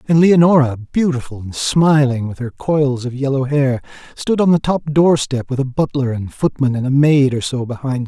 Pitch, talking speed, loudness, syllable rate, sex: 135 Hz, 210 wpm, -16 LUFS, 5.1 syllables/s, male